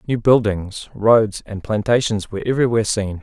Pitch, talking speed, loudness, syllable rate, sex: 110 Hz, 150 wpm, -18 LUFS, 5.3 syllables/s, male